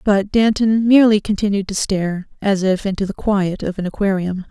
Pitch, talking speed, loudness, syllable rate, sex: 200 Hz, 185 wpm, -17 LUFS, 5.4 syllables/s, female